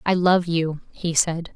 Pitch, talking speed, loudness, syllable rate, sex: 170 Hz, 195 wpm, -22 LUFS, 3.7 syllables/s, female